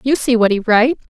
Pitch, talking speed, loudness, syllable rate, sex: 240 Hz, 265 wpm, -14 LUFS, 6.2 syllables/s, female